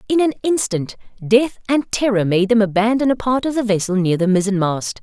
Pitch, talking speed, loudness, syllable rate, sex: 215 Hz, 215 wpm, -17 LUFS, 5.4 syllables/s, female